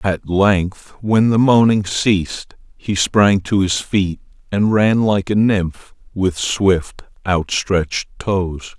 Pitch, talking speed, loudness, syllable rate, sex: 100 Hz, 135 wpm, -17 LUFS, 3.2 syllables/s, male